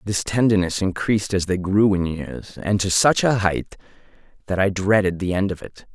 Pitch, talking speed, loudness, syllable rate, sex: 95 Hz, 200 wpm, -20 LUFS, 5.1 syllables/s, male